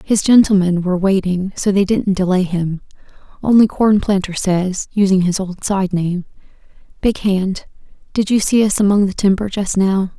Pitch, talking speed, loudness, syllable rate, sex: 195 Hz, 165 wpm, -16 LUFS, 4.8 syllables/s, female